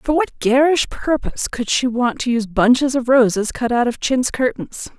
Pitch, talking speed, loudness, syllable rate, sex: 250 Hz, 205 wpm, -17 LUFS, 4.9 syllables/s, female